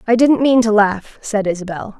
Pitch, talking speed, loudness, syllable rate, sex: 215 Hz, 210 wpm, -15 LUFS, 5.0 syllables/s, female